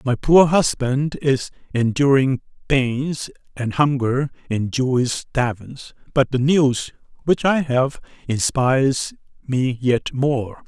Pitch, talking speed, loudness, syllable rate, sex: 135 Hz, 120 wpm, -20 LUFS, 3.4 syllables/s, male